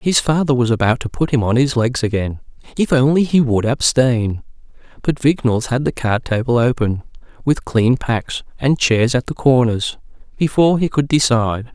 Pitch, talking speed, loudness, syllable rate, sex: 125 Hz, 175 wpm, -17 LUFS, 5.0 syllables/s, male